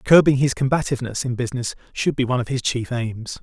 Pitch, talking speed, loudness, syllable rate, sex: 125 Hz, 210 wpm, -21 LUFS, 6.4 syllables/s, male